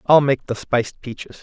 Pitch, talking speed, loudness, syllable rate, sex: 130 Hz, 210 wpm, -19 LUFS, 5.3 syllables/s, male